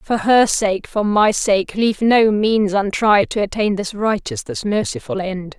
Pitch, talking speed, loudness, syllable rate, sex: 205 Hz, 185 wpm, -17 LUFS, 4.1 syllables/s, female